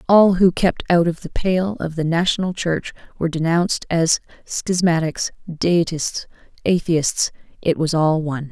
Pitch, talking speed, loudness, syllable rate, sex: 170 Hz, 140 wpm, -19 LUFS, 4.5 syllables/s, female